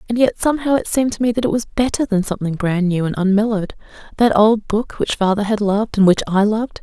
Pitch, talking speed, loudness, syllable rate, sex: 215 Hz, 235 wpm, -17 LUFS, 6.6 syllables/s, female